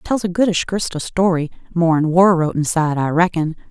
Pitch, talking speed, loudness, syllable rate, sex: 170 Hz, 195 wpm, -17 LUFS, 5.4 syllables/s, female